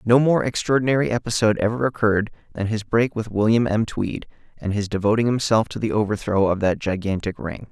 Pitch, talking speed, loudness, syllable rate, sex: 110 Hz, 185 wpm, -21 LUFS, 5.9 syllables/s, male